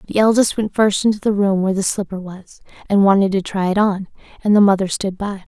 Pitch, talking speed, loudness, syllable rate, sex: 195 Hz, 240 wpm, -17 LUFS, 6.0 syllables/s, female